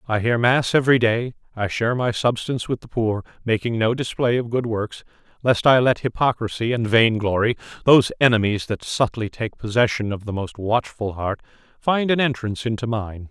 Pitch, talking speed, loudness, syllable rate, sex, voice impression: 115 Hz, 180 wpm, -21 LUFS, 5.3 syllables/s, male, masculine, adult-like, tensed, powerful, clear, fluent, intellectual, sincere, calm, wild, lively, slightly strict, light